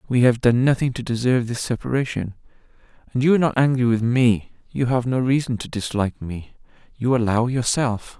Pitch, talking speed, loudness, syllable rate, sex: 120 Hz, 185 wpm, -21 LUFS, 5.6 syllables/s, male